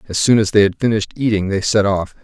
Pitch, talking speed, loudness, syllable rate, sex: 105 Hz, 270 wpm, -16 LUFS, 6.6 syllables/s, male